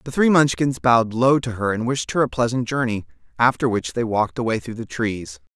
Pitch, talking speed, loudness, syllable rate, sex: 120 Hz, 225 wpm, -20 LUFS, 5.6 syllables/s, male